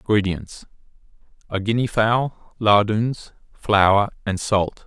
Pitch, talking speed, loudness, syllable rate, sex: 105 Hz, 85 wpm, -20 LUFS, 3.5 syllables/s, male